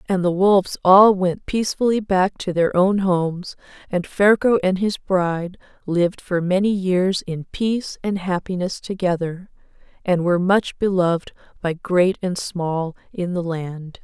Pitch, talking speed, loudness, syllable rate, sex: 185 Hz, 155 wpm, -20 LUFS, 4.4 syllables/s, female